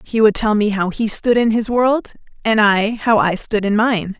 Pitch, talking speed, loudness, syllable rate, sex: 215 Hz, 245 wpm, -16 LUFS, 4.5 syllables/s, female